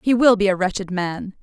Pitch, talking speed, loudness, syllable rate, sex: 200 Hz, 255 wpm, -19 LUFS, 5.4 syllables/s, female